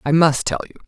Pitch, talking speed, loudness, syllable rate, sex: 155 Hz, 275 wpm, -19 LUFS, 6.5 syllables/s, female